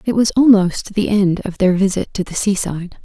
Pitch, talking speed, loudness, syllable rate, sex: 195 Hz, 215 wpm, -16 LUFS, 5.2 syllables/s, female